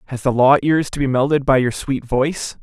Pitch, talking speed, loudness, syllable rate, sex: 135 Hz, 250 wpm, -17 LUFS, 5.6 syllables/s, male